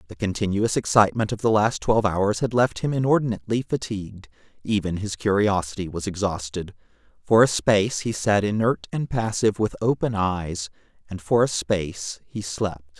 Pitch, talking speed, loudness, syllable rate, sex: 100 Hz, 160 wpm, -23 LUFS, 5.3 syllables/s, male